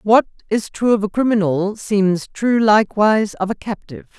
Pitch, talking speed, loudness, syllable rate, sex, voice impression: 205 Hz, 170 wpm, -17 LUFS, 5.0 syllables/s, female, feminine, middle-aged, tensed, powerful, bright, slightly soft, clear, intellectual, calm, friendly, elegant, lively, slightly kind